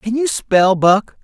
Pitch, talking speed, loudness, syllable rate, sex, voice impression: 190 Hz, 195 wpm, -14 LUFS, 3.4 syllables/s, male, very masculine, slightly thick, slightly tensed, slightly cool, slightly intellectual, slightly calm, slightly friendly, slightly wild, lively